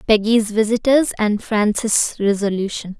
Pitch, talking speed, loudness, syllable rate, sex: 215 Hz, 100 wpm, -18 LUFS, 4.4 syllables/s, female